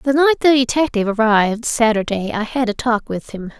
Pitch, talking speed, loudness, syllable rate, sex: 235 Hz, 200 wpm, -17 LUFS, 5.6 syllables/s, female